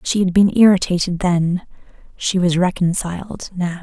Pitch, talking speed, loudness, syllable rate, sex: 180 Hz, 140 wpm, -17 LUFS, 4.7 syllables/s, female